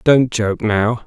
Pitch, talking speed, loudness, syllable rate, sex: 115 Hz, 170 wpm, -17 LUFS, 3.2 syllables/s, male